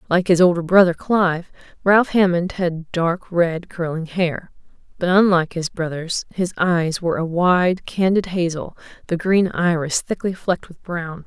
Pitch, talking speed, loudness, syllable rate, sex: 175 Hz, 155 wpm, -19 LUFS, 4.5 syllables/s, female